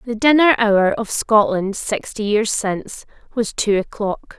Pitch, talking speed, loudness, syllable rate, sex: 215 Hz, 150 wpm, -18 LUFS, 4.1 syllables/s, female